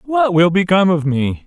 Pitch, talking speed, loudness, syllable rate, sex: 180 Hz, 205 wpm, -15 LUFS, 5.3 syllables/s, male